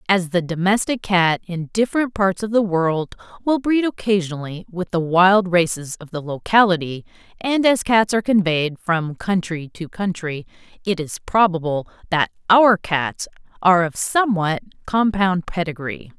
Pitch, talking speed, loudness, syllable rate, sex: 185 Hz, 150 wpm, -19 LUFS, 4.6 syllables/s, female